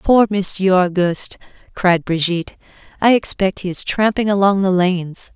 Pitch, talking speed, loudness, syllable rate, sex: 190 Hz, 145 wpm, -17 LUFS, 4.9 syllables/s, female